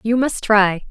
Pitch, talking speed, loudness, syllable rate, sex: 220 Hz, 200 wpm, -16 LUFS, 4.1 syllables/s, female